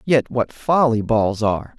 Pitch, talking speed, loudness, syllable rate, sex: 120 Hz, 170 wpm, -19 LUFS, 4.2 syllables/s, male